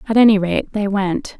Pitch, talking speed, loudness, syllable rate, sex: 205 Hz, 215 wpm, -17 LUFS, 5.4 syllables/s, female